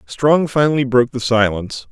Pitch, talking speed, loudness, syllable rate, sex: 125 Hz, 155 wpm, -16 LUFS, 5.7 syllables/s, male